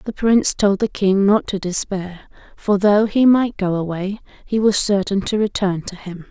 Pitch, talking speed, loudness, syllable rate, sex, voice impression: 200 Hz, 200 wpm, -18 LUFS, 4.6 syllables/s, female, very feminine, very adult-like, very thin, very relaxed, very weak, dark, soft, slightly muffled, very fluent, raspy, cute, very intellectual, refreshing, very sincere, very calm, very friendly, very reassuring, very unique, elegant, wild, very sweet, slightly lively, very kind, slightly sharp, modest, slightly light